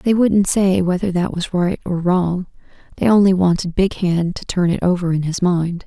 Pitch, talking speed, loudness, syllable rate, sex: 180 Hz, 215 wpm, -17 LUFS, 4.8 syllables/s, female